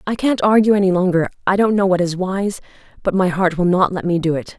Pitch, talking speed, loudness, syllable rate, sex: 185 Hz, 250 wpm, -17 LUFS, 6.0 syllables/s, female